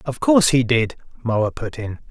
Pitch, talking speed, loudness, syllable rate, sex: 130 Hz, 200 wpm, -19 LUFS, 4.9 syllables/s, male